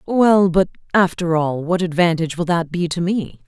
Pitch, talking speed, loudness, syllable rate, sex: 175 Hz, 190 wpm, -18 LUFS, 4.9 syllables/s, female